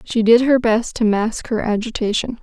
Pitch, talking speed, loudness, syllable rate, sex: 225 Hz, 200 wpm, -17 LUFS, 4.7 syllables/s, female